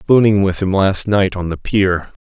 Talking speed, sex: 215 wpm, male